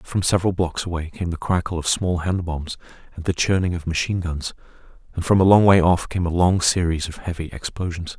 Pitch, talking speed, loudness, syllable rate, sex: 85 Hz, 220 wpm, -21 LUFS, 5.7 syllables/s, male